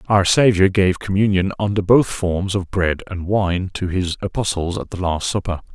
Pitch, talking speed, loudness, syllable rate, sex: 95 Hz, 190 wpm, -19 LUFS, 4.7 syllables/s, male